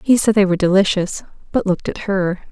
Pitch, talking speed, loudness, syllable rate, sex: 195 Hz, 215 wpm, -17 LUFS, 6.4 syllables/s, female